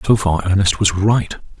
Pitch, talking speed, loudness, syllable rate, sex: 100 Hz, 190 wpm, -16 LUFS, 4.7 syllables/s, male